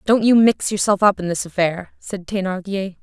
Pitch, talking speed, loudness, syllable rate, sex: 195 Hz, 200 wpm, -18 LUFS, 4.9 syllables/s, female